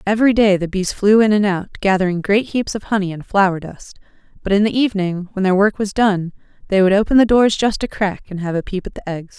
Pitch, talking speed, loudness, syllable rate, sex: 200 Hz, 255 wpm, -17 LUFS, 5.9 syllables/s, female